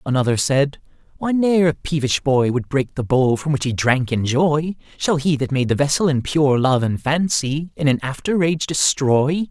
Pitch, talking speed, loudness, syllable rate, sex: 145 Hz, 200 wpm, -19 LUFS, 4.7 syllables/s, male